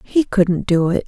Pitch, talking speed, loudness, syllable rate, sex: 195 Hz, 225 wpm, -17 LUFS, 4.2 syllables/s, female